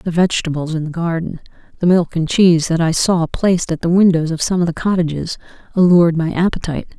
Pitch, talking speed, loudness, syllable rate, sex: 170 Hz, 205 wpm, -16 LUFS, 6.2 syllables/s, female